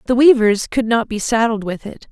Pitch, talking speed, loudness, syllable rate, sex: 225 Hz, 225 wpm, -16 LUFS, 5.1 syllables/s, female